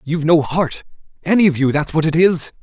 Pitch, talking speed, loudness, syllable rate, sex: 160 Hz, 205 wpm, -16 LUFS, 5.7 syllables/s, male